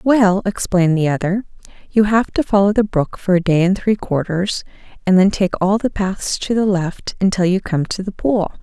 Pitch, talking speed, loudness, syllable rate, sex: 195 Hz, 215 wpm, -17 LUFS, 5.0 syllables/s, female